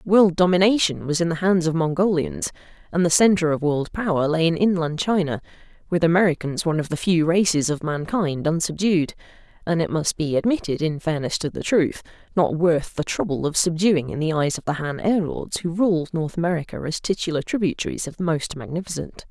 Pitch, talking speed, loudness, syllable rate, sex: 165 Hz, 190 wpm, -22 LUFS, 5.5 syllables/s, female